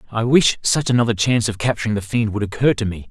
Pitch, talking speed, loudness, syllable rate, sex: 110 Hz, 250 wpm, -18 LUFS, 6.7 syllables/s, male